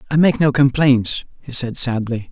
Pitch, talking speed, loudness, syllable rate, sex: 130 Hz, 180 wpm, -17 LUFS, 4.6 syllables/s, male